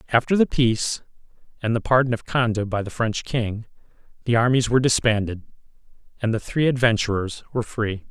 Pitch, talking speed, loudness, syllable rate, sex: 115 Hz, 165 wpm, -22 LUFS, 5.8 syllables/s, male